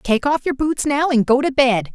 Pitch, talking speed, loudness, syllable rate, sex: 270 Hz, 280 wpm, -17 LUFS, 4.8 syllables/s, female